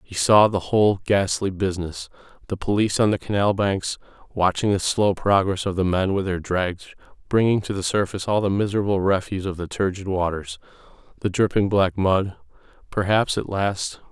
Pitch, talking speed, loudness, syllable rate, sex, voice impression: 95 Hz, 175 wpm, -22 LUFS, 5.4 syllables/s, male, very masculine, very middle-aged, very thick, tensed, very powerful, bright, soft, slightly muffled, slightly fluent, raspy, cool, very intellectual, refreshing, sincere, very calm, very mature, friendly, reassuring, very unique, elegant, wild, slightly sweet, lively, very kind, modest